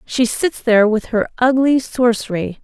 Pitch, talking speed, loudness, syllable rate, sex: 235 Hz, 160 wpm, -16 LUFS, 4.6 syllables/s, female